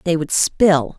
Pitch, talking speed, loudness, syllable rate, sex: 165 Hz, 185 wpm, -16 LUFS, 3.5 syllables/s, female